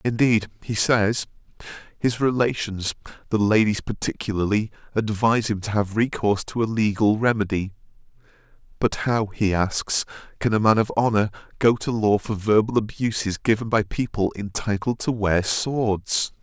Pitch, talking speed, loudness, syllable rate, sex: 110 Hz, 140 wpm, -22 LUFS, 4.7 syllables/s, male